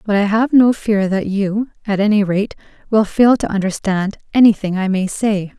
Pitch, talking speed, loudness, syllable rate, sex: 205 Hz, 195 wpm, -16 LUFS, 4.8 syllables/s, female